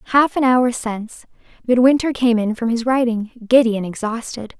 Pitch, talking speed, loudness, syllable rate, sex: 240 Hz, 170 wpm, -17 LUFS, 5.4 syllables/s, female